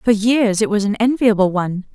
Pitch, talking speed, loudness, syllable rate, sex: 215 Hz, 215 wpm, -16 LUFS, 5.6 syllables/s, female